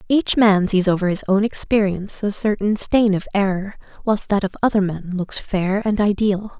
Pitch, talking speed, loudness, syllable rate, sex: 200 Hz, 190 wpm, -19 LUFS, 4.9 syllables/s, female